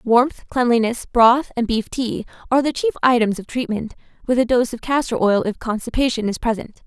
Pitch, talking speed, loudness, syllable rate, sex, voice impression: 240 Hz, 190 wpm, -19 LUFS, 5.4 syllables/s, female, feminine, adult-like, slightly fluent, slightly intellectual, slightly refreshing